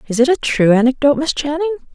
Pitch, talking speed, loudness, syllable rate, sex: 270 Hz, 215 wpm, -15 LUFS, 7.2 syllables/s, female